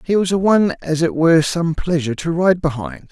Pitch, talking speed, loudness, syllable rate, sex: 165 Hz, 230 wpm, -17 LUFS, 5.8 syllables/s, male